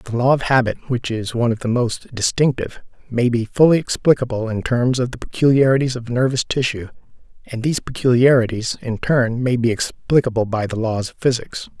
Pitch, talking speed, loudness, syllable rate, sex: 120 Hz, 185 wpm, -18 LUFS, 5.6 syllables/s, male